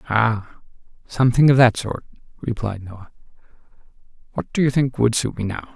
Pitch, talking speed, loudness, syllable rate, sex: 115 Hz, 155 wpm, -20 LUFS, 5.0 syllables/s, male